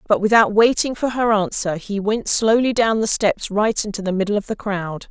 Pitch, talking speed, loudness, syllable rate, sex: 210 Hz, 225 wpm, -19 LUFS, 5.1 syllables/s, female